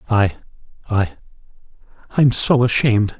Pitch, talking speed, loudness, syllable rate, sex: 110 Hz, 55 wpm, -18 LUFS, 4.8 syllables/s, male